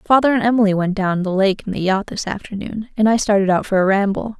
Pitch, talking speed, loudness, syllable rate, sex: 205 Hz, 260 wpm, -18 LUFS, 6.2 syllables/s, female